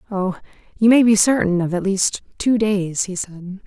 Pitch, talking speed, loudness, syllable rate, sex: 200 Hz, 195 wpm, -18 LUFS, 4.5 syllables/s, female